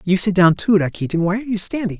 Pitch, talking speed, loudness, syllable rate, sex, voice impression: 195 Hz, 270 wpm, -17 LUFS, 6.9 syllables/s, male, very masculine, slightly middle-aged, very thick, tensed, slightly powerful, slightly dark, slightly hard, clear, very fluent, cool, intellectual, very refreshing, sincere, slightly calm, slightly mature, friendly, slightly reassuring, very unique, elegant, slightly wild, slightly sweet, lively, slightly kind, intense